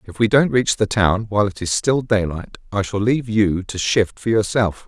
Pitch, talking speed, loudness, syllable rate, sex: 105 Hz, 235 wpm, -19 LUFS, 5.0 syllables/s, male